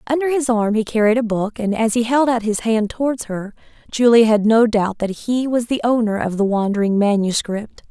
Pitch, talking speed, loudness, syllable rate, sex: 225 Hz, 220 wpm, -18 LUFS, 5.2 syllables/s, female